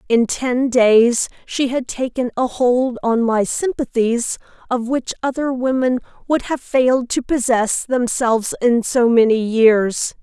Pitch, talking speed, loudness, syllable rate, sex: 245 Hz, 145 wpm, -17 LUFS, 3.9 syllables/s, female